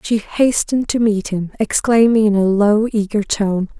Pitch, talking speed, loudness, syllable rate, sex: 210 Hz, 175 wpm, -16 LUFS, 4.5 syllables/s, female